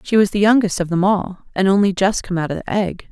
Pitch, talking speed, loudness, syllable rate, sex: 190 Hz, 290 wpm, -17 LUFS, 6.1 syllables/s, female